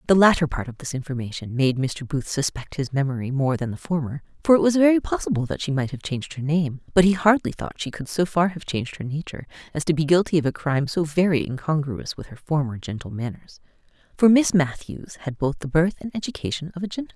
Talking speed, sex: 235 wpm, female